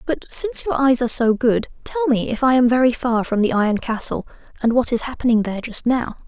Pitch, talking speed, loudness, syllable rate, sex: 235 Hz, 240 wpm, -19 LUFS, 6.1 syllables/s, female